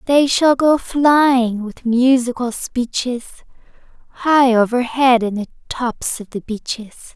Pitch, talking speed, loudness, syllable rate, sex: 250 Hz, 125 wpm, -17 LUFS, 3.4 syllables/s, female